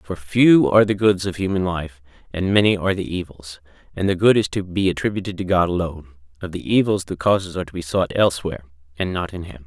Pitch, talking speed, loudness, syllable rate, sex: 90 Hz, 230 wpm, -20 LUFS, 6.3 syllables/s, male